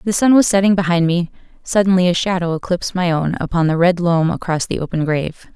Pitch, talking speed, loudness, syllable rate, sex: 175 Hz, 215 wpm, -16 LUFS, 6.1 syllables/s, female